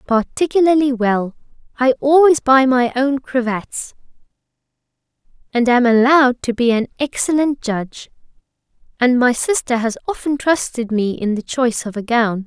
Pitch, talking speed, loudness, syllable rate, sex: 250 Hz, 140 wpm, -16 LUFS, 4.8 syllables/s, female